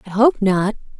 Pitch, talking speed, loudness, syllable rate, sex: 215 Hz, 180 wpm, -17 LUFS, 4.9 syllables/s, female